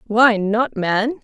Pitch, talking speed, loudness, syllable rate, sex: 225 Hz, 145 wpm, -17 LUFS, 3.0 syllables/s, female